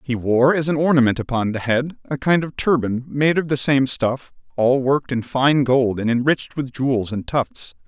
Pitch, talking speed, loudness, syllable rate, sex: 130 Hz, 215 wpm, -19 LUFS, 4.9 syllables/s, male